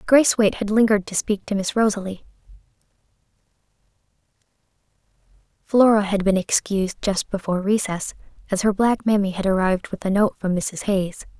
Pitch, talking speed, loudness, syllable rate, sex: 200 Hz, 145 wpm, -21 LUFS, 5.8 syllables/s, female